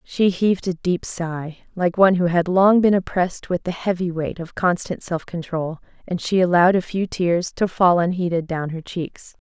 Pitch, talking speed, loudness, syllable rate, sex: 175 Hz, 205 wpm, -20 LUFS, 4.9 syllables/s, female